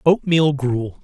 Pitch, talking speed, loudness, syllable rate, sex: 145 Hz, 175 wpm, -18 LUFS, 3.4 syllables/s, male